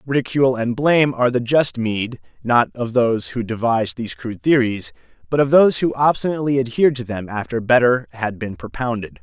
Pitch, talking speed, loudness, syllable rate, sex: 120 Hz, 180 wpm, -19 LUFS, 5.9 syllables/s, male